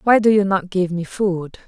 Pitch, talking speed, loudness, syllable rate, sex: 190 Hz, 250 wpm, -19 LUFS, 4.7 syllables/s, female